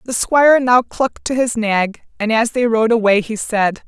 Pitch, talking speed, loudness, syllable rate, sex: 230 Hz, 215 wpm, -16 LUFS, 4.8 syllables/s, female